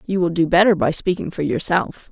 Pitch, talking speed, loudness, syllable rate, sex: 170 Hz, 225 wpm, -18 LUFS, 5.5 syllables/s, female